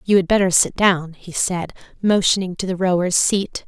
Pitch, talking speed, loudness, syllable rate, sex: 185 Hz, 195 wpm, -18 LUFS, 4.9 syllables/s, female